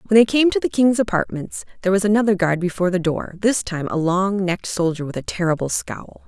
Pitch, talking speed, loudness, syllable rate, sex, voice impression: 190 Hz, 230 wpm, -20 LUFS, 6.0 syllables/s, female, very feminine, adult-like, slightly middle-aged, thin, very tensed, very powerful, bright, hard, very clear, fluent, very cool, intellectual, very refreshing, slightly calm, friendly, reassuring, slightly unique, elegant, slightly wild, slightly sweet, very lively, slightly strict